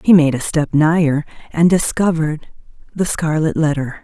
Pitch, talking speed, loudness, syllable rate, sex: 155 Hz, 150 wpm, -16 LUFS, 4.9 syllables/s, female